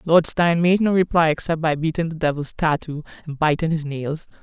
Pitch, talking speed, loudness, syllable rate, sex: 160 Hz, 205 wpm, -20 LUFS, 5.5 syllables/s, female